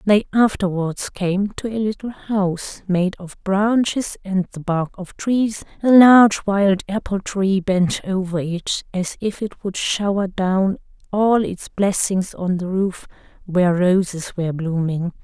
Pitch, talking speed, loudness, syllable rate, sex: 190 Hz, 155 wpm, -19 LUFS, 3.9 syllables/s, female